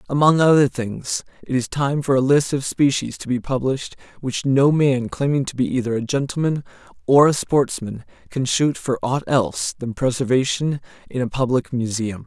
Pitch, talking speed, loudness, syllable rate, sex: 135 Hz, 180 wpm, -20 LUFS, 5.0 syllables/s, male